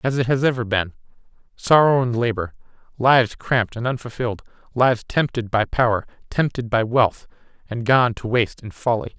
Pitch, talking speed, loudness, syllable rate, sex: 120 Hz, 155 wpm, -20 LUFS, 5.5 syllables/s, male